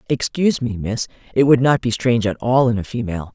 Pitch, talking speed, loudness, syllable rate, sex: 120 Hz, 235 wpm, -18 LUFS, 6.3 syllables/s, female